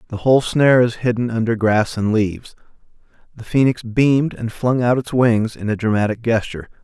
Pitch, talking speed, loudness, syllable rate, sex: 115 Hz, 185 wpm, -18 LUFS, 5.6 syllables/s, male